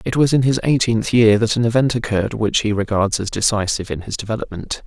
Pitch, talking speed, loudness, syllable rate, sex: 110 Hz, 220 wpm, -18 LUFS, 6.1 syllables/s, male